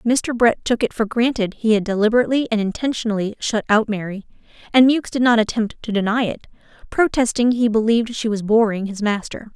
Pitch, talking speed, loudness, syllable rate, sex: 225 Hz, 190 wpm, -19 LUFS, 5.8 syllables/s, female